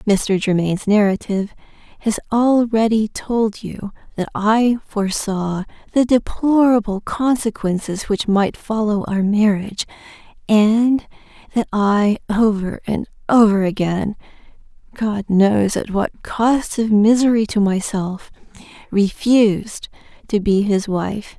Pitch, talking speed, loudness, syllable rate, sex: 210 Hz, 110 wpm, -18 LUFS, 3.6 syllables/s, female